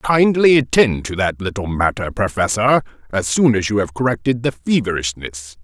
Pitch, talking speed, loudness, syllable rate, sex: 110 Hz, 160 wpm, -17 LUFS, 5.0 syllables/s, male